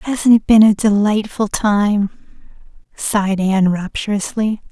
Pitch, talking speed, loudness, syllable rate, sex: 205 Hz, 115 wpm, -15 LUFS, 4.4 syllables/s, female